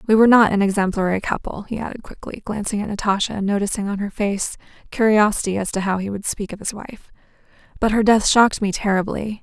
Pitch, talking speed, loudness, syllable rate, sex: 205 Hz, 210 wpm, -20 LUFS, 6.2 syllables/s, female